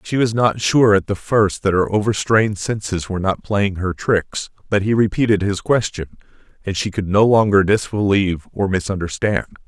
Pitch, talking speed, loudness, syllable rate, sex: 100 Hz, 180 wpm, -18 LUFS, 5.1 syllables/s, male